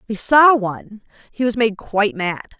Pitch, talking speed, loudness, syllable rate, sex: 220 Hz, 210 wpm, -17 LUFS, 5.3 syllables/s, female